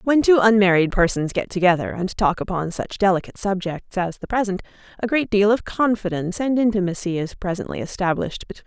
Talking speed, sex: 185 wpm, female